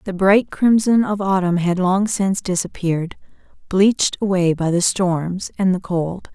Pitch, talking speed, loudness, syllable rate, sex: 185 Hz, 160 wpm, -18 LUFS, 4.5 syllables/s, female